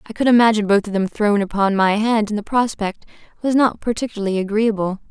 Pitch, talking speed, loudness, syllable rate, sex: 215 Hz, 200 wpm, -18 LUFS, 6.1 syllables/s, female